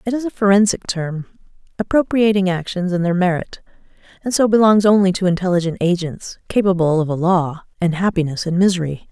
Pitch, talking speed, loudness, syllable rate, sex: 185 Hz, 165 wpm, -17 LUFS, 5.8 syllables/s, female